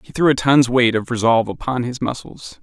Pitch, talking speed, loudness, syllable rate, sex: 125 Hz, 230 wpm, -17 LUFS, 5.5 syllables/s, male